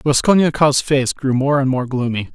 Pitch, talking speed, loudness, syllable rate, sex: 135 Hz, 180 wpm, -16 LUFS, 5.0 syllables/s, male